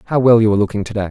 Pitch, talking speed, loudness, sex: 110 Hz, 380 wpm, -14 LUFS, male